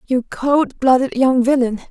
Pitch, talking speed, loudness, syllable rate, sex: 260 Hz, 155 wpm, -16 LUFS, 4.1 syllables/s, female